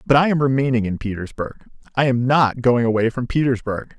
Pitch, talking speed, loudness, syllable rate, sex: 125 Hz, 195 wpm, -19 LUFS, 5.7 syllables/s, male